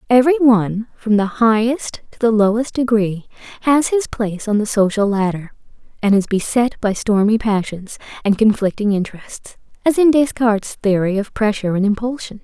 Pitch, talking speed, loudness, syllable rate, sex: 220 Hz, 160 wpm, -17 LUFS, 5.3 syllables/s, female